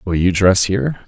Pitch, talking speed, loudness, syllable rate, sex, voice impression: 90 Hz, 225 wpm, -15 LUFS, 5.2 syllables/s, male, masculine, adult-like, tensed, powerful, soft, muffled, intellectual, calm, wild, lively, kind